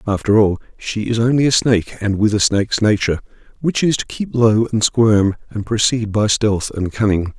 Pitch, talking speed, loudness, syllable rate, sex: 110 Hz, 205 wpm, -17 LUFS, 5.1 syllables/s, male